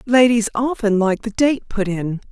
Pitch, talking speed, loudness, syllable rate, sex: 220 Hz, 180 wpm, -18 LUFS, 4.5 syllables/s, female